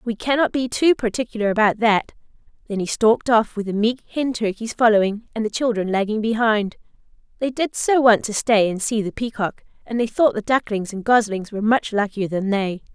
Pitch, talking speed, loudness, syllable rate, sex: 220 Hz, 205 wpm, -20 LUFS, 5.5 syllables/s, female